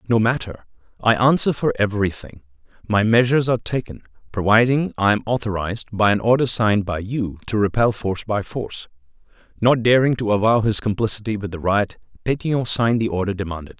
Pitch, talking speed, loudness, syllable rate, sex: 110 Hz, 170 wpm, -20 LUFS, 6.1 syllables/s, male